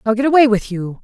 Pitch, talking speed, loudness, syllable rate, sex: 230 Hz, 290 wpm, -14 LUFS, 6.7 syllables/s, female